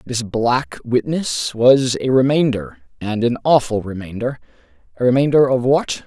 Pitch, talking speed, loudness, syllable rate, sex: 120 Hz, 130 wpm, -17 LUFS, 4.4 syllables/s, male